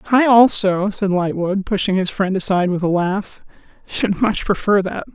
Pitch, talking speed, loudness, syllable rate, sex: 195 Hz, 175 wpm, -17 LUFS, 4.8 syllables/s, female